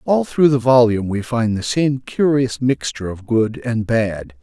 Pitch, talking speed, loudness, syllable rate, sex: 120 Hz, 190 wpm, -18 LUFS, 4.4 syllables/s, male